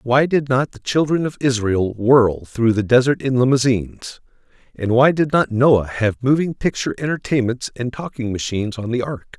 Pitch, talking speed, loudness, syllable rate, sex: 125 Hz, 180 wpm, -18 LUFS, 4.9 syllables/s, male